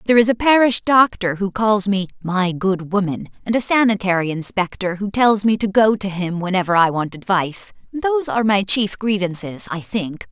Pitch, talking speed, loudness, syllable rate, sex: 200 Hz, 190 wpm, -18 LUFS, 5.2 syllables/s, female